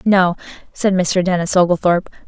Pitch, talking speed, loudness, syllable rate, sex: 180 Hz, 130 wpm, -16 LUFS, 5.5 syllables/s, female